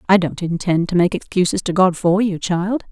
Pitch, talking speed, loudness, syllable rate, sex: 185 Hz, 225 wpm, -18 LUFS, 5.2 syllables/s, female